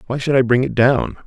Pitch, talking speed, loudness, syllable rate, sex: 130 Hz, 285 wpm, -16 LUFS, 5.8 syllables/s, male